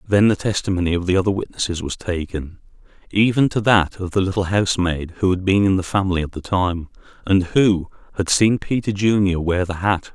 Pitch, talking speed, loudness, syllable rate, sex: 95 Hz, 200 wpm, -19 LUFS, 5.6 syllables/s, male